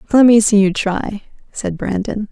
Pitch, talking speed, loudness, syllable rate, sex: 210 Hz, 180 wpm, -15 LUFS, 4.6 syllables/s, female